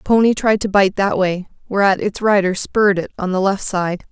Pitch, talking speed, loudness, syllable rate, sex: 195 Hz, 235 wpm, -17 LUFS, 5.5 syllables/s, female